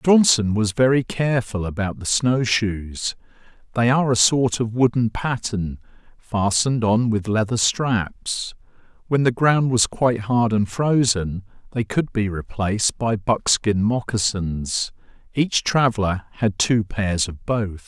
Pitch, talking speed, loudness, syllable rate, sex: 110 Hz, 140 wpm, -21 LUFS, 4.0 syllables/s, male